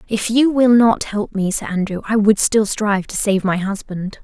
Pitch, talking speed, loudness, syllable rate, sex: 210 Hz, 225 wpm, -17 LUFS, 4.7 syllables/s, female